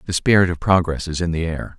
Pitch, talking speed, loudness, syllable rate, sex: 85 Hz, 270 wpm, -19 LUFS, 6.1 syllables/s, male